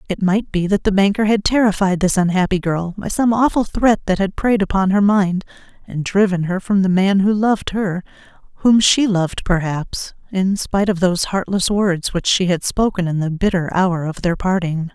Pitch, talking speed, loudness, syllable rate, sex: 190 Hz, 205 wpm, -17 LUFS, 5.1 syllables/s, female